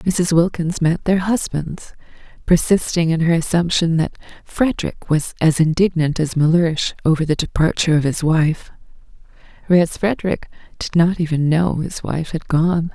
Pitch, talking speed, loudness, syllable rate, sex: 165 Hz, 150 wpm, -18 LUFS, 4.8 syllables/s, female